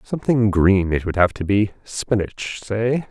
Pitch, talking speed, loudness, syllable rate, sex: 105 Hz, 175 wpm, -20 LUFS, 4.2 syllables/s, male